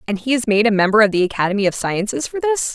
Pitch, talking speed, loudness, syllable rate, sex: 215 Hz, 285 wpm, -17 LUFS, 7.0 syllables/s, female